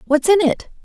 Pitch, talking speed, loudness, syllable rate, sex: 315 Hz, 215 wpm, -16 LUFS, 5.5 syllables/s, female